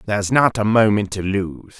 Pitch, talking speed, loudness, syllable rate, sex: 105 Hz, 200 wpm, -18 LUFS, 5.3 syllables/s, male